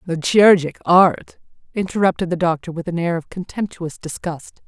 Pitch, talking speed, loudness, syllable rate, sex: 175 Hz, 155 wpm, -18 LUFS, 5.3 syllables/s, female